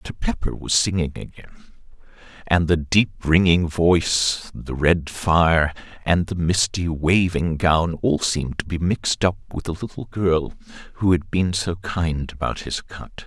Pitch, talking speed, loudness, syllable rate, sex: 85 Hz, 165 wpm, -21 LUFS, 4.2 syllables/s, male